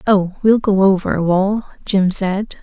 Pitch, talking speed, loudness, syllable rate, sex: 195 Hz, 160 wpm, -16 LUFS, 3.7 syllables/s, female